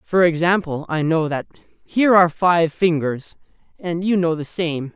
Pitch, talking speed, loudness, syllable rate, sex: 165 Hz, 170 wpm, -19 LUFS, 4.7 syllables/s, male